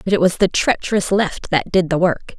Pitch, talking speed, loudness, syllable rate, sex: 180 Hz, 250 wpm, -17 LUFS, 5.2 syllables/s, female